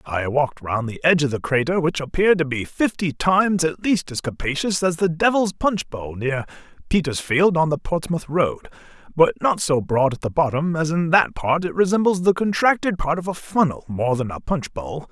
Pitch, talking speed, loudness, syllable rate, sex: 160 Hz, 210 wpm, -21 LUFS, 5.1 syllables/s, male